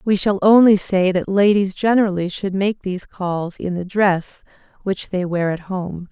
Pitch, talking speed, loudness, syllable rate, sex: 190 Hz, 185 wpm, -18 LUFS, 4.5 syllables/s, female